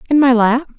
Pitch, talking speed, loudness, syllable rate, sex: 255 Hz, 230 wpm, -13 LUFS, 5.3 syllables/s, female